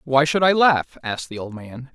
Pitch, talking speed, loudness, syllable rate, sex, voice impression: 140 Hz, 245 wpm, -19 LUFS, 5.0 syllables/s, male, masculine, adult-like, tensed, slightly powerful, bright, clear, fluent, sincere, friendly, slightly wild, lively, light